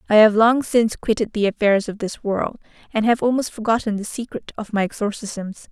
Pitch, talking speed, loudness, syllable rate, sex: 215 Hz, 200 wpm, -20 LUFS, 5.5 syllables/s, female